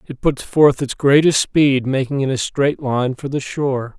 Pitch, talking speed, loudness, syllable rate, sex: 135 Hz, 210 wpm, -17 LUFS, 4.4 syllables/s, male